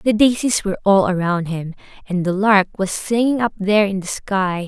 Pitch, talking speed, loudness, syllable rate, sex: 200 Hz, 205 wpm, -18 LUFS, 5.1 syllables/s, female